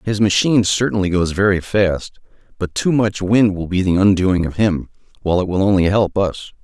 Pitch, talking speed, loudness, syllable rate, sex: 95 Hz, 200 wpm, -17 LUFS, 5.2 syllables/s, male